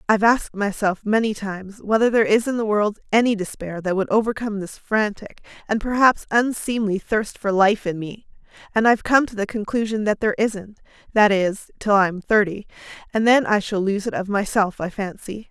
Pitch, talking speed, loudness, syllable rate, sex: 210 Hz, 195 wpm, -20 LUFS, 5.5 syllables/s, female